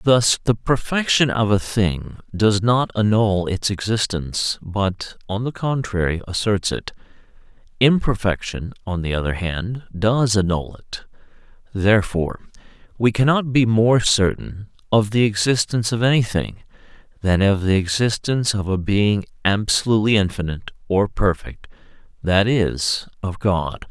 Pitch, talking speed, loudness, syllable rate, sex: 105 Hz, 125 wpm, -20 LUFS, 4.5 syllables/s, male